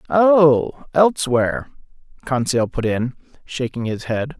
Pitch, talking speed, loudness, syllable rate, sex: 135 Hz, 110 wpm, -19 LUFS, 4.0 syllables/s, male